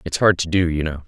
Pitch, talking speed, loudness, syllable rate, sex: 85 Hz, 335 wpm, -19 LUFS, 6.2 syllables/s, male